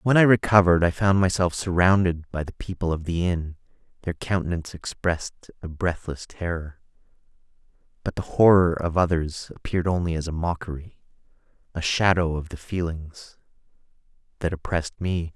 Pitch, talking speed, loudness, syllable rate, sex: 85 Hz, 145 wpm, -24 LUFS, 5.5 syllables/s, male